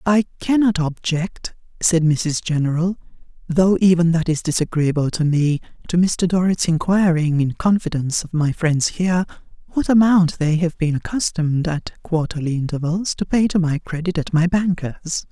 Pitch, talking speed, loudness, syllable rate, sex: 170 Hz, 150 wpm, -19 LUFS, 4.8 syllables/s, female